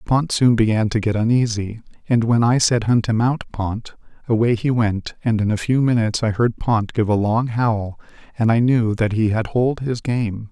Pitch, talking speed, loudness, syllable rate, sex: 115 Hz, 215 wpm, -19 LUFS, 4.9 syllables/s, male